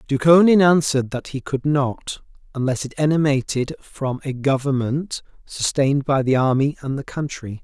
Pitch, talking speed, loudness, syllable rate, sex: 140 Hz, 150 wpm, -20 LUFS, 4.9 syllables/s, male